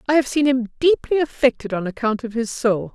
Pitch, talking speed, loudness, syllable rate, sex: 245 Hz, 225 wpm, -20 LUFS, 5.7 syllables/s, female